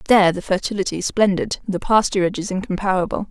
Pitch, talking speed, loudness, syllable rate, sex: 190 Hz, 165 wpm, -20 LUFS, 6.8 syllables/s, female